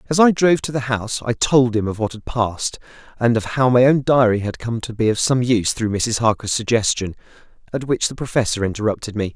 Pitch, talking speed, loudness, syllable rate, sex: 120 Hz, 230 wpm, -19 LUFS, 6.0 syllables/s, male